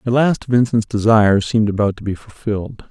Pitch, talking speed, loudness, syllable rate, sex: 110 Hz, 185 wpm, -17 LUFS, 5.7 syllables/s, male